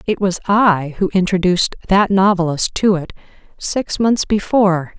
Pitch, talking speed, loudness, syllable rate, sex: 190 Hz, 145 wpm, -16 LUFS, 4.6 syllables/s, female